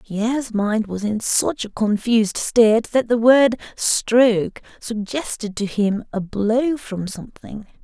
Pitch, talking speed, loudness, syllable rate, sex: 220 Hz, 145 wpm, -19 LUFS, 3.9 syllables/s, female